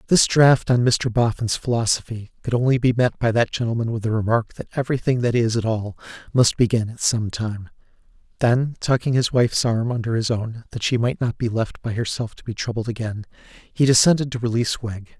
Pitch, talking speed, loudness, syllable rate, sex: 115 Hz, 205 wpm, -21 LUFS, 5.6 syllables/s, male